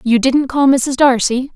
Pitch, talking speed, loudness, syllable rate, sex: 260 Hz, 195 wpm, -13 LUFS, 4.1 syllables/s, female